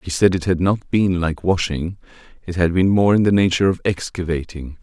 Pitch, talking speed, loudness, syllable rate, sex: 90 Hz, 210 wpm, -19 LUFS, 5.4 syllables/s, male